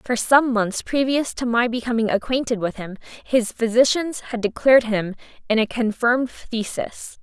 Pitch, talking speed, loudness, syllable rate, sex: 235 Hz, 160 wpm, -21 LUFS, 4.7 syllables/s, female